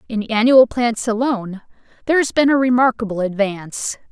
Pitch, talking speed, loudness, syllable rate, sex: 230 Hz, 145 wpm, -17 LUFS, 5.6 syllables/s, female